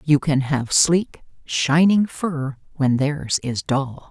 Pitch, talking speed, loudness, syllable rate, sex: 145 Hz, 145 wpm, -20 LUFS, 3.2 syllables/s, female